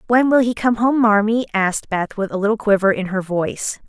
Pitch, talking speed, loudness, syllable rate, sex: 210 Hz, 230 wpm, -18 LUFS, 5.6 syllables/s, female